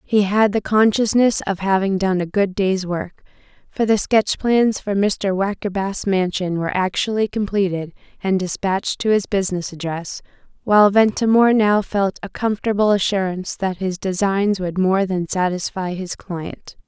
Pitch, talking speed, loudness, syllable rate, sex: 195 Hz, 155 wpm, -19 LUFS, 4.8 syllables/s, female